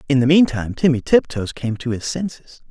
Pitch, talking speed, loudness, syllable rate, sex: 135 Hz, 200 wpm, -18 LUFS, 5.7 syllables/s, male